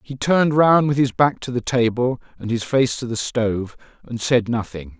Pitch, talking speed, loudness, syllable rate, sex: 125 Hz, 215 wpm, -20 LUFS, 4.9 syllables/s, male